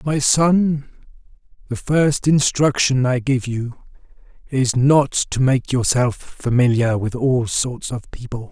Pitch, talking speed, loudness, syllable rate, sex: 130 Hz, 135 wpm, -18 LUFS, 3.6 syllables/s, male